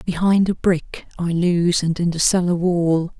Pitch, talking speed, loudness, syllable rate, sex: 175 Hz, 170 wpm, -19 LUFS, 4.4 syllables/s, female